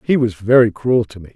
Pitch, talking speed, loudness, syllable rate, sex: 115 Hz, 265 wpm, -15 LUFS, 5.8 syllables/s, male